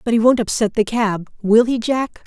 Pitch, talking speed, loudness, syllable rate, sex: 225 Hz, 240 wpm, -17 LUFS, 5.0 syllables/s, female